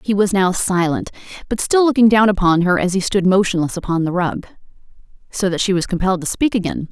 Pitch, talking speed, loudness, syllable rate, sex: 190 Hz, 210 wpm, -17 LUFS, 6.1 syllables/s, female